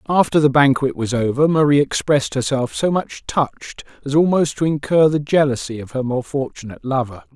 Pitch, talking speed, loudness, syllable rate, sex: 140 Hz, 180 wpm, -18 LUFS, 5.5 syllables/s, male